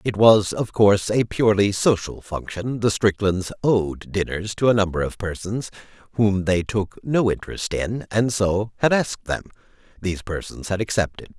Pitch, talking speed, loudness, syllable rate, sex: 100 Hz, 170 wpm, -22 LUFS, 4.9 syllables/s, male